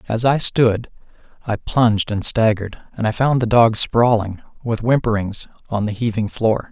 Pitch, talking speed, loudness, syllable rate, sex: 115 Hz, 170 wpm, -18 LUFS, 4.9 syllables/s, male